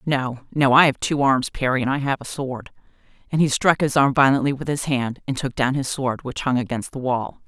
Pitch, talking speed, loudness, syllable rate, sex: 135 Hz, 250 wpm, -21 LUFS, 5.3 syllables/s, female